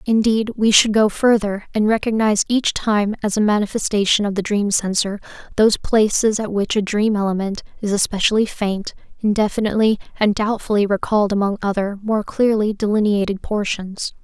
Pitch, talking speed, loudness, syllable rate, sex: 210 Hz, 150 wpm, -18 LUFS, 5.5 syllables/s, female